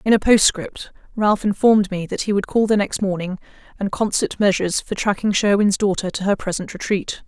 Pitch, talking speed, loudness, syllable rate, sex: 200 Hz, 200 wpm, -19 LUFS, 5.6 syllables/s, female